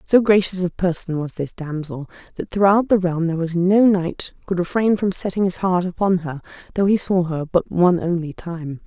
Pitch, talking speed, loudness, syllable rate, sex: 180 Hz, 210 wpm, -20 LUFS, 5.1 syllables/s, female